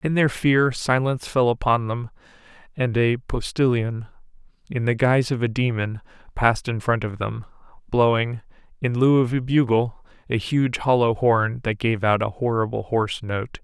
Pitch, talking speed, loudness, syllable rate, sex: 120 Hz, 165 wpm, -22 LUFS, 4.8 syllables/s, male